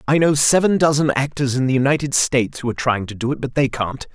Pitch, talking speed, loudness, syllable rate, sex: 135 Hz, 260 wpm, -18 LUFS, 6.3 syllables/s, male